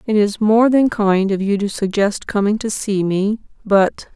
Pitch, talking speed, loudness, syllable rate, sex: 205 Hz, 200 wpm, -17 LUFS, 4.6 syllables/s, female